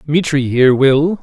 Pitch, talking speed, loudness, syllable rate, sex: 145 Hz, 145 wpm, -13 LUFS, 4.4 syllables/s, male